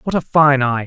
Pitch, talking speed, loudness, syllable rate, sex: 140 Hz, 275 wpm, -14 LUFS, 5.2 syllables/s, male